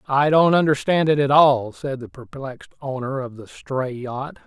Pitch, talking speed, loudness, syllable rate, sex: 135 Hz, 190 wpm, -20 LUFS, 4.6 syllables/s, male